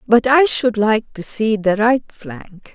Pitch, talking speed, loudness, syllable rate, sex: 220 Hz, 195 wpm, -16 LUFS, 3.5 syllables/s, female